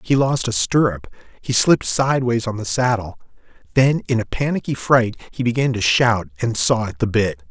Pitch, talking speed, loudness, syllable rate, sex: 115 Hz, 190 wpm, -19 LUFS, 5.3 syllables/s, male